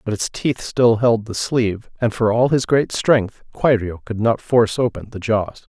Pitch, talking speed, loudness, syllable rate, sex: 115 Hz, 210 wpm, -19 LUFS, 4.4 syllables/s, male